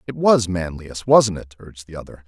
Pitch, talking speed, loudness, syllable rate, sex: 95 Hz, 210 wpm, -18 LUFS, 5.3 syllables/s, male